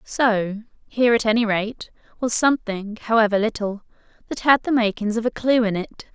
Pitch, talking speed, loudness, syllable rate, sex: 220 Hz, 165 wpm, -21 LUFS, 5.6 syllables/s, female